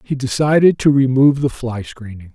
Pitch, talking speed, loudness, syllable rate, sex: 130 Hz, 180 wpm, -15 LUFS, 5.3 syllables/s, male